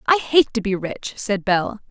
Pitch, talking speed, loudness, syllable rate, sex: 220 Hz, 220 wpm, -20 LUFS, 4.4 syllables/s, female